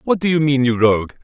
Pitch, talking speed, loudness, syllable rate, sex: 140 Hz, 290 wpm, -16 LUFS, 6.0 syllables/s, male